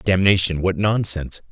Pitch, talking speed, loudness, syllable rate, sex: 95 Hz, 120 wpm, -19 LUFS, 5.0 syllables/s, male